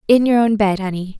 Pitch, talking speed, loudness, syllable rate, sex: 210 Hz, 200 wpm, -16 LUFS, 5.8 syllables/s, female